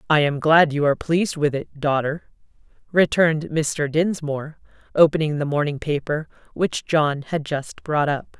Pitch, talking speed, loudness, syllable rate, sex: 150 Hz, 155 wpm, -21 LUFS, 4.8 syllables/s, female